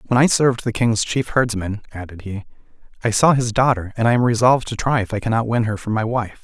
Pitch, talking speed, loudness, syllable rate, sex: 115 Hz, 250 wpm, -19 LUFS, 6.1 syllables/s, male